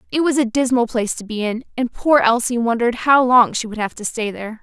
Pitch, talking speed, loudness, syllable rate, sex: 240 Hz, 260 wpm, -18 LUFS, 6.1 syllables/s, female